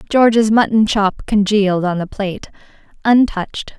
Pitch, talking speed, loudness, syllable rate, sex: 205 Hz, 125 wpm, -15 LUFS, 5.1 syllables/s, female